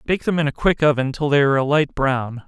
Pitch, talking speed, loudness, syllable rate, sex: 145 Hz, 290 wpm, -19 LUFS, 6.0 syllables/s, male